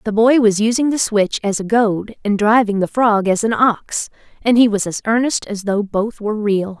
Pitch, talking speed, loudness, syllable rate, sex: 215 Hz, 230 wpm, -16 LUFS, 4.8 syllables/s, female